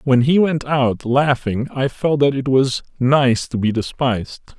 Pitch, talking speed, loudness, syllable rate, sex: 130 Hz, 185 wpm, -18 LUFS, 4.1 syllables/s, male